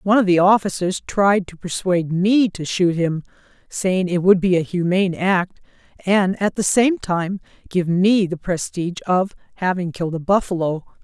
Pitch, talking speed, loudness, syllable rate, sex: 185 Hz, 175 wpm, -19 LUFS, 4.9 syllables/s, female